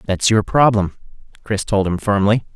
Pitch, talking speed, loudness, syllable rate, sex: 105 Hz, 165 wpm, -17 LUFS, 4.9 syllables/s, male